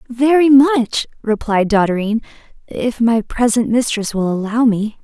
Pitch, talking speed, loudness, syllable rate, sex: 230 Hz, 130 wpm, -15 LUFS, 4.5 syllables/s, female